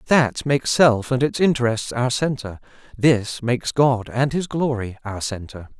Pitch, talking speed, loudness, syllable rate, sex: 125 Hz, 165 wpm, -20 LUFS, 4.6 syllables/s, male